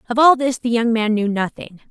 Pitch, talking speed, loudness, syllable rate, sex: 235 Hz, 250 wpm, -17 LUFS, 5.5 syllables/s, female